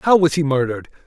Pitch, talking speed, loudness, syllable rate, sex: 150 Hz, 225 wpm, -18 LUFS, 7.6 syllables/s, male